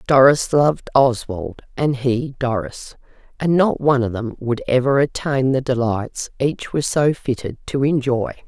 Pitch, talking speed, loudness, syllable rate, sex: 130 Hz, 155 wpm, -19 LUFS, 4.3 syllables/s, female